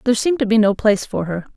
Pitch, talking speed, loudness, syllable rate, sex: 220 Hz, 310 wpm, -18 LUFS, 8.1 syllables/s, female